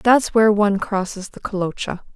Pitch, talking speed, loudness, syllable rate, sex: 205 Hz, 165 wpm, -19 LUFS, 5.5 syllables/s, female